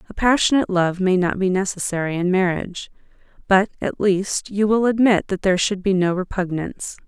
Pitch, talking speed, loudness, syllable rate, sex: 190 Hz, 180 wpm, -20 LUFS, 5.5 syllables/s, female